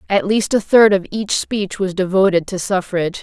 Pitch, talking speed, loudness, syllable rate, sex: 195 Hz, 205 wpm, -16 LUFS, 4.9 syllables/s, female